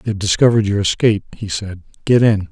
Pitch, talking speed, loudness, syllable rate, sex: 105 Hz, 190 wpm, -16 LUFS, 6.0 syllables/s, male